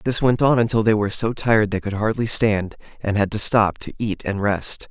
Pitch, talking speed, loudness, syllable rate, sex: 110 Hz, 245 wpm, -20 LUFS, 5.4 syllables/s, male